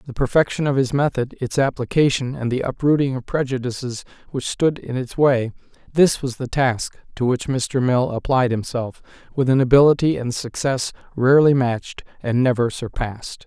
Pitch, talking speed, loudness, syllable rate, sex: 130 Hz, 160 wpm, -20 LUFS, 5.2 syllables/s, male